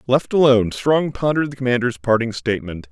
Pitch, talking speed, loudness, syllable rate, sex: 125 Hz, 165 wpm, -18 LUFS, 6.2 syllables/s, male